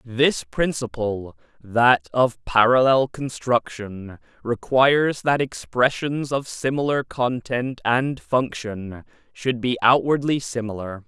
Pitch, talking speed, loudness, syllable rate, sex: 120 Hz, 95 wpm, -21 LUFS, 3.6 syllables/s, male